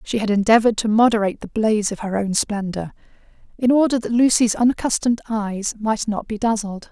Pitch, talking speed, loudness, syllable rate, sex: 220 Hz, 180 wpm, -19 LUFS, 5.9 syllables/s, female